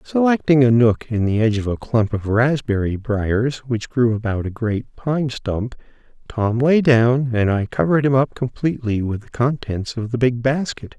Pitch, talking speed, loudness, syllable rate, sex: 120 Hz, 190 wpm, -19 LUFS, 4.7 syllables/s, male